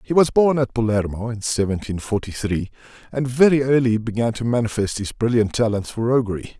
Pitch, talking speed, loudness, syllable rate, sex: 115 Hz, 180 wpm, -20 LUFS, 5.6 syllables/s, male